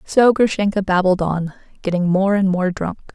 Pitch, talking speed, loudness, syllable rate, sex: 190 Hz, 170 wpm, -18 LUFS, 4.9 syllables/s, female